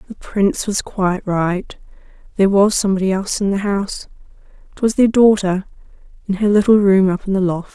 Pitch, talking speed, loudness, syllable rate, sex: 195 Hz, 180 wpm, -16 LUFS, 5.9 syllables/s, female